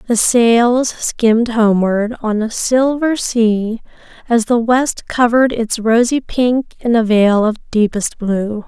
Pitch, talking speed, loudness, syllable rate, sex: 230 Hz, 145 wpm, -14 LUFS, 3.6 syllables/s, female